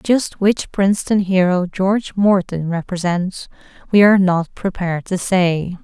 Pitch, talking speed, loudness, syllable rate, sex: 190 Hz, 135 wpm, -17 LUFS, 4.4 syllables/s, female